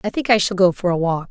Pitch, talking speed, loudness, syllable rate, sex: 190 Hz, 370 wpm, -18 LUFS, 6.6 syllables/s, female